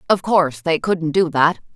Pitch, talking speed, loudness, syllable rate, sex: 165 Hz, 205 wpm, -18 LUFS, 4.8 syllables/s, female